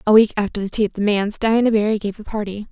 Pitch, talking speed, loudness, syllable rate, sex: 210 Hz, 290 wpm, -19 LUFS, 7.2 syllables/s, female